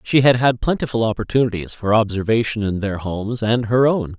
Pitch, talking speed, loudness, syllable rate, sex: 110 Hz, 185 wpm, -19 LUFS, 5.6 syllables/s, male